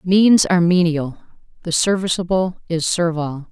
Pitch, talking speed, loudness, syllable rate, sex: 175 Hz, 120 wpm, -17 LUFS, 4.8 syllables/s, female